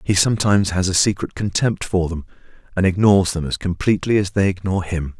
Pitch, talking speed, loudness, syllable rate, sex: 95 Hz, 195 wpm, -19 LUFS, 6.3 syllables/s, male